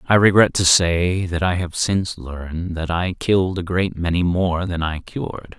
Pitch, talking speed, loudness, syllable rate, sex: 90 Hz, 205 wpm, -19 LUFS, 4.8 syllables/s, male